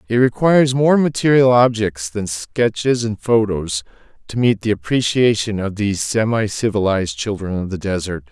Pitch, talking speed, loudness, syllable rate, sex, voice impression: 110 Hz, 150 wpm, -17 LUFS, 4.9 syllables/s, male, masculine, adult-like, tensed, powerful, clear, fluent, cool, intellectual, calm, friendly, reassuring, wild, lively, slightly strict